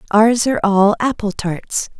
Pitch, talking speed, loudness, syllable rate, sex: 210 Hz, 150 wpm, -16 LUFS, 4.3 syllables/s, female